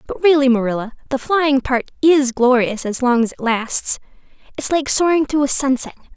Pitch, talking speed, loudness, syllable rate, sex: 265 Hz, 185 wpm, -17 LUFS, 5.1 syllables/s, female